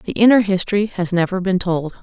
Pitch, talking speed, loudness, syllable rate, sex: 190 Hz, 210 wpm, -17 LUFS, 5.6 syllables/s, female